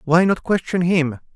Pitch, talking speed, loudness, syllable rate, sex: 170 Hz, 175 wpm, -19 LUFS, 4.5 syllables/s, male